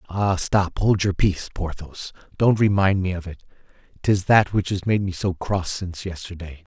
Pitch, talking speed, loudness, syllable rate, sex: 95 Hz, 185 wpm, -22 LUFS, 4.8 syllables/s, male